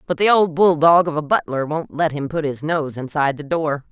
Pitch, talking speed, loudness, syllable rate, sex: 155 Hz, 245 wpm, -18 LUFS, 5.4 syllables/s, female